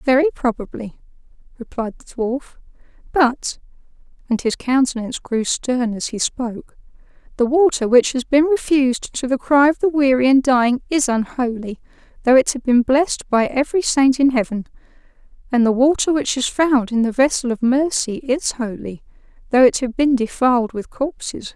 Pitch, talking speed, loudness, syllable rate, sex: 255 Hz, 165 wpm, -18 LUFS, 4.5 syllables/s, female